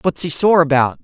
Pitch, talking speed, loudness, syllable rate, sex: 160 Hz, 230 wpm, -15 LUFS, 5.5 syllables/s, male